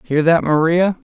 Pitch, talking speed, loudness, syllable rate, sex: 165 Hz, 160 wpm, -15 LUFS, 4.4 syllables/s, male